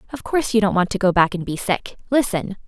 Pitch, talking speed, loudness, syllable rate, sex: 205 Hz, 270 wpm, -20 LUFS, 6.3 syllables/s, female